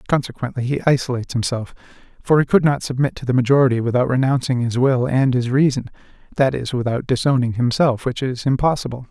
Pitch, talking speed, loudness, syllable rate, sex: 130 Hz, 170 wpm, -19 LUFS, 6.2 syllables/s, male